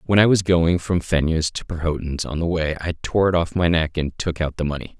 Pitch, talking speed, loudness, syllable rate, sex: 85 Hz, 265 wpm, -21 LUFS, 5.5 syllables/s, male